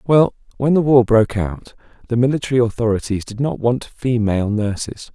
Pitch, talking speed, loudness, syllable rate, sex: 120 Hz, 165 wpm, -18 LUFS, 5.4 syllables/s, male